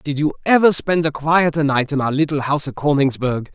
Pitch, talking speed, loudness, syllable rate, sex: 150 Hz, 220 wpm, -17 LUFS, 5.7 syllables/s, male